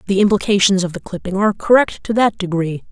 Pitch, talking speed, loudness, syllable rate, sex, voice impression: 195 Hz, 205 wpm, -16 LUFS, 6.3 syllables/s, female, feminine, slightly young, adult-like, thin, slightly tensed, slightly powerful, slightly dark, very hard, very clear, fluent, slightly cute, cool, intellectual, slightly refreshing, very sincere, very calm, slightly friendly, slightly reassuring, elegant, slightly wild, slightly sweet, slightly strict, slightly sharp